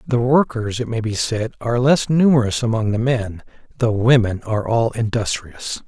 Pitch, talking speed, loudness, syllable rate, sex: 115 Hz, 175 wpm, -19 LUFS, 4.9 syllables/s, male